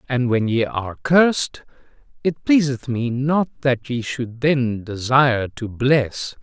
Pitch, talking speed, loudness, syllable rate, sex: 130 Hz, 150 wpm, -20 LUFS, 3.8 syllables/s, male